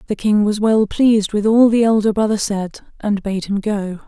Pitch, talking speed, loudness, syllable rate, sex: 210 Hz, 220 wpm, -16 LUFS, 4.9 syllables/s, female